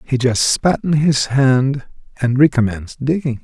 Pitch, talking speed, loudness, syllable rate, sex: 135 Hz, 155 wpm, -16 LUFS, 4.5 syllables/s, male